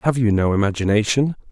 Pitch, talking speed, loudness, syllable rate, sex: 115 Hz, 160 wpm, -19 LUFS, 6.3 syllables/s, male